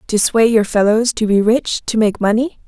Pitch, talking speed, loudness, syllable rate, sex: 220 Hz, 225 wpm, -15 LUFS, 4.9 syllables/s, female